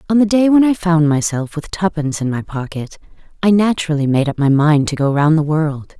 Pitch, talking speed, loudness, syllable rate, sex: 160 Hz, 230 wpm, -15 LUFS, 5.6 syllables/s, female